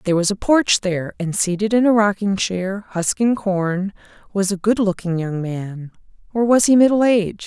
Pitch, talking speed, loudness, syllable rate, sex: 200 Hz, 195 wpm, -18 LUFS, 4.9 syllables/s, female